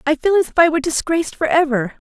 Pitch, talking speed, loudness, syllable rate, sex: 305 Hz, 230 wpm, -17 LUFS, 7.0 syllables/s, female